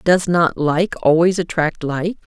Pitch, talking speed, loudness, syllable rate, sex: 170 Hz, 155 wpm, -17 LUFS, 4.0 syllables/s, female